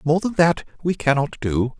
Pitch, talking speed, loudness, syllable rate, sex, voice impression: 155 Hz, 200 wpm, -21 LUFS, 4.6 syllables/s, male, masculine, adult-like, fluent, slightly intellectual, slightly wild, slightly lively